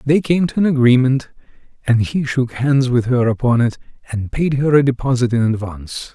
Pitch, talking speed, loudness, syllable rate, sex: 130 Hz, 195 wpm, -17 LUFS, 5.2 syllables/s, male